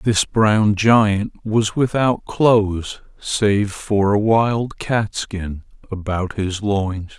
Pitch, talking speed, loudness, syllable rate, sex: 105 Hz, 125 wpm, -18 LUFS, 2.7 syllables/s, male